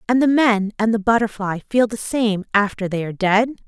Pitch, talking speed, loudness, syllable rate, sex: 215 Hz, 215 wpm, -19 LUFS, 5.3 syllables/s, female